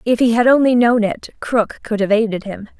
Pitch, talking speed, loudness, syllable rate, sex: 225 Hz, 235 wpm, -16 LUFS, 5.2 syllables/s, female